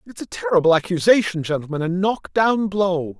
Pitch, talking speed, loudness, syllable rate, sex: 180 Hz, 170 wpm, -19 LUFS, 5.3 syllables/s, male